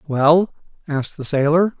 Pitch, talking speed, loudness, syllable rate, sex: 155 Hz, 135 wpm, -18 LUFS, 4.7 syllables/s, male